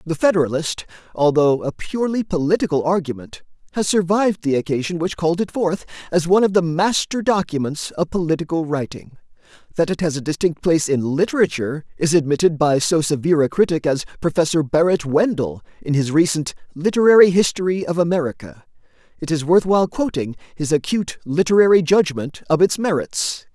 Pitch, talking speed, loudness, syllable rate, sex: 165 Hz, 160 wpm, -19 LUFS, 5.8 syllables/s, male